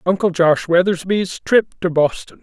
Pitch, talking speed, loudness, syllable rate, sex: 180 Hz, 150 wpm, -17 LUFS, 4.7 syllables/s, male